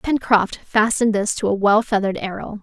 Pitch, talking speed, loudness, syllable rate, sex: 210 Hz, 185 wpm, -19 LUFS, 5.4 syllables/s, female